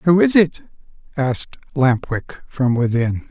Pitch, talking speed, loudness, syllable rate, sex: 140 Hz, 145 wpm, -18 LUFS, 4.0 syllables/s, male